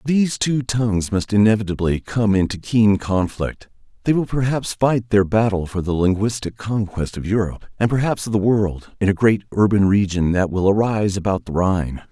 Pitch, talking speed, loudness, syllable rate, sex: 105 Hz, 185 wpm, -19 LUFS, 5.2 syllables/s, male